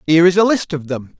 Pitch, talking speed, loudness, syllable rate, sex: 165 Hz, 300 wpm, -15 LUFS, 6.9 syllables/s, male